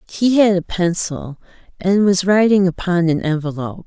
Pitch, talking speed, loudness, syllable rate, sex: 180 Hz, 155 wpm, -17 LUFS, 4.8 syllables/s, female